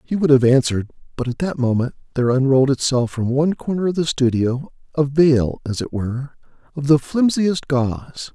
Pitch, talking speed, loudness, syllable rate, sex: 135 Hz, 185 wpm, -19 LUFS, 5.5 syllables/s, male